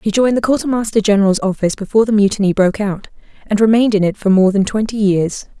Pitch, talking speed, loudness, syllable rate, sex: 205 Hz, 215 wpm, -15 LUFS, 7.1 syllables/s, female